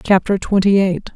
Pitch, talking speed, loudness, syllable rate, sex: 190 Hz, 155 wpm, -16 LUFS, 4.9 syllables/s, female